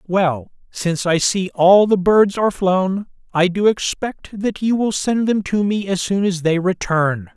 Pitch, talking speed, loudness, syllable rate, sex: 190 Hz, 195 wpm, -18 LUFS, 4.2 syllables/s, male